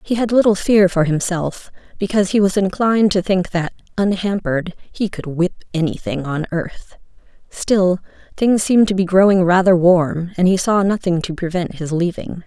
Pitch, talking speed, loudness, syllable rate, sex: 185 Hz, 175 wpm, -17 LUFS, 5.0 syllables/s, female